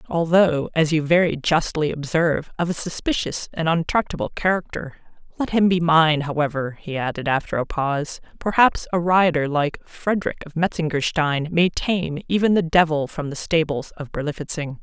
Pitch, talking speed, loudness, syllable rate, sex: 160 Hz, 160 wpm, -21 LUFS, 5.1 syllables/s, female